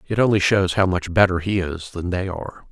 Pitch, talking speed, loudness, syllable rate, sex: 90 Hz, 245 wpm, -20 LUFS, 5.5 syllables/s, male